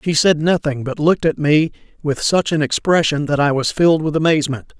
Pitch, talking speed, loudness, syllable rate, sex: 150 Hz, 215 wpm, -17 LUFS, 5.7 syllables/s, male